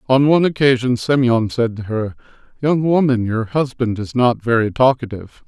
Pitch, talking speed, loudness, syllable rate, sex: 125 Hz, 165 wpm, -17 LUFS, 5.2 syllables/s, male